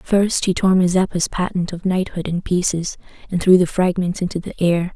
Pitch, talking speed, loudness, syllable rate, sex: 180 Hz, 195 wpm, -19 LUFS, 5.1 syllables/s, female